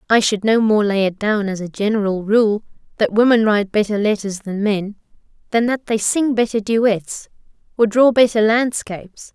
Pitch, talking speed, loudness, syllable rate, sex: 215 Hz, 180 wpm, -17 LUFS, 4.9 syllables/s, female